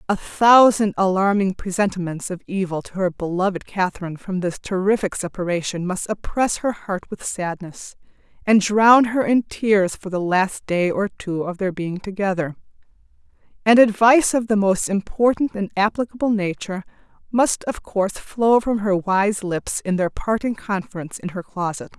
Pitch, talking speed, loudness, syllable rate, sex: 195 Hz, 160 wpm, -20 LUFS, 4.9 syllables/s, female